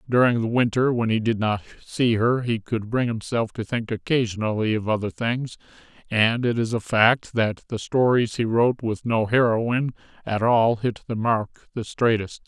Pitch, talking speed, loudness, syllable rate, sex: 115 Hz, 190 wpm, -23 LUFS, 4.8 syllables/s, male